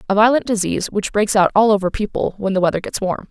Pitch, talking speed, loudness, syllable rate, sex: 205 Hz, 255 wpm, -17 LUFS, 6.6 syllables/s, female